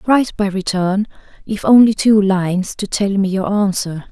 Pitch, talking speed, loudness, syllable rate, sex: 200 Hz, 175 wpm, -15 LUFS, 4.8 syllables/s, female